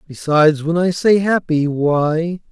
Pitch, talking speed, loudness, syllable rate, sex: 165 Hz, 145 wpm, -16 LUFS, 4.0 syllables/s, male